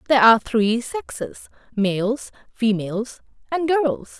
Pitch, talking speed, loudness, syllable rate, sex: 240 Hz, 115 wpm, -21 LUFS, 4.1 syllables/s, female